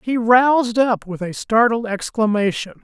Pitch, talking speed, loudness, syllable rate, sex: 225 Hz, 150 wpm, -18 LUFS, 4.5 syllables/s, male